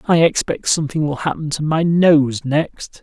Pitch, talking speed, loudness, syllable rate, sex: 155 Hz, 180 wpm, -17 LUFS, 4.5 syllables/s, male